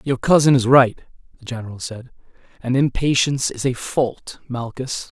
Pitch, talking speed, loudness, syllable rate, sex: 125 Hz, 150 wpm, -19 LUFS, 5.0 syllables/s, male